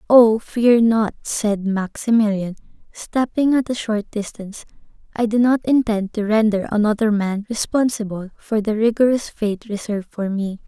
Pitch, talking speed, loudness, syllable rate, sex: 220 Hz, 145 wpm, -19 LUFS, 4.6 syllables/s, female